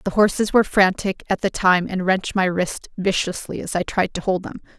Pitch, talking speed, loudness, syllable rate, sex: 190 Hz, 225 wpm, -20 LUFS, 5.6 syllables/s, female